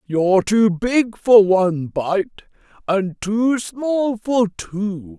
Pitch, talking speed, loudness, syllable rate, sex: 215 Hz, 125 wpm, -18 LUFS, 2.9 syllables/s, female